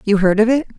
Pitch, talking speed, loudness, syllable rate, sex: 220 Hz, 305 wpm, -15 LUFS, 6.8 syllables/s, female